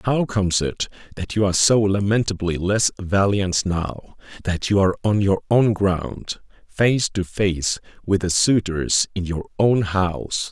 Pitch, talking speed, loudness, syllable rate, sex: 100 Hz, 160 wpm, -20 LUFS, 4.2 syllables/s, male